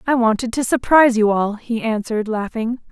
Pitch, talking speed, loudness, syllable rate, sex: 230 Hz, 185 wpm, -18 LUFS, 5.6 syllables/s, female